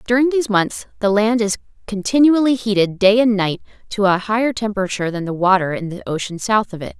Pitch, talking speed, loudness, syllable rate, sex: 210 Hz, 205 wpm, -17 LUFS, 6.0 syllables/s, female